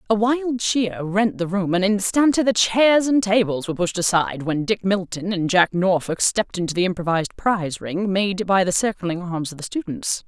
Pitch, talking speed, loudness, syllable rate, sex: 195 Hz, 205 wpm, -20 LUFS, 5.1 syllables/s, female